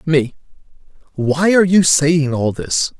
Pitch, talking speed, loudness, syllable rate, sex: 150 Hz, 140 wpm, -15 LUFS, 3.9 syllables/s, male